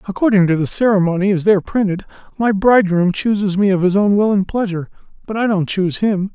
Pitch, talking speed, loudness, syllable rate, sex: 195 Hz, 210 wpm, -16 LUFS, 6.4 syllables/s, male